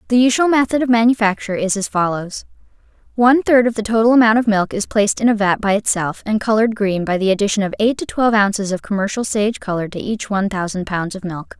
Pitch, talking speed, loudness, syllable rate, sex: 210 Hz, 235 wpm, -17 LUFS, 6.4 syllables/s, female